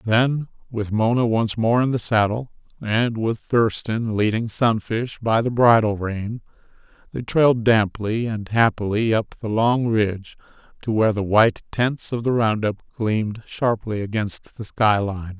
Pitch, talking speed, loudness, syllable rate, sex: 110 Hz, 155 wpm, -21 LUFS, 4.2 syllables/s, male